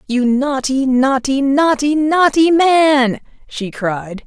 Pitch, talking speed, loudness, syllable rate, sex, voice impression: 275 Hz, 115 wpm, -14 LUFS, 3.1 syllables/s, female, feminine, very adult-like, slightly clear, intellectual, slightly elegant, slightly sweet